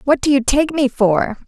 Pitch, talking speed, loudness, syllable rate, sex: 260 Hz, 245 wpm, -16 LUFS, 4.7 syllables/s, female